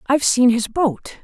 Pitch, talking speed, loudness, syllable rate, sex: 255 Hz, 195 wpm, -17 LUFS, 4.8 syllables/s, female